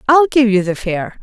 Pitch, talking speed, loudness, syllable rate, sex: 235 Hz, 245 wpm, -14 LUFS, 4.7 syllables/s, female